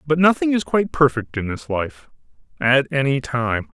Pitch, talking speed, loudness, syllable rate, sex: 140 Hz, 175 wpm, -20 LUFS, 4.9 syllables/s, male